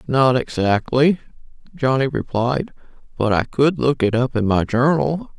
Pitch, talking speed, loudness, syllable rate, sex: 130 Hz, 145 wpm, -19 LUFS, 4.3 syllables/s, female